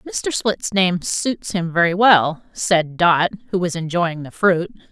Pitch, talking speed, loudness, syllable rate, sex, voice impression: 175 Hz, 170 wpm, -18 LUFS, 3.7 syllables/s, female, very feminine, very adult-like, middle-aged, thin, tensed, powerful, very bright, very hard, very clear, very fluent, slightly raspy, slightly cute, cool, very intellectual, refreshing, sincere, calm, slightly friendly, slightly reassuring, very unique, elegant, wild, slightly sweet, very lively, very strict, intense, very sharp